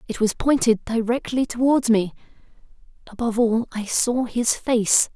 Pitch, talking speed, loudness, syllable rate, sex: 235 Hz, 130 wpm, -21 LUFS, 4.6 syllables/s, female